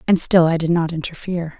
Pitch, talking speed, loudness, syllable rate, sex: 170 Hz, 225 wpm, -18 LUFS, 6.3 syllables/s, female